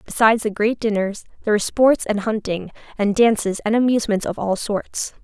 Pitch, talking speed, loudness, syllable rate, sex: 215 Hz, 185 wpm, -20 LUFS, 5.7 syllables/s, female